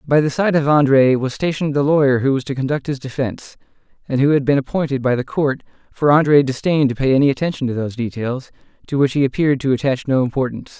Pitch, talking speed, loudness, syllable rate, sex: 135 Hz, 230 wpm, -17 LUFS, 6.8 syllables/s, male